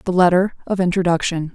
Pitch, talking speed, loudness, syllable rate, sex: 180 Hz, 155 wpm, -18 LUFS, 6.1 syllables/s, female